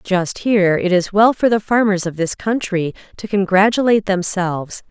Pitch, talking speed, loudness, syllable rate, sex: 195 Hz, 170 wpm, -17 LUFS, 5.1 syllables/s, female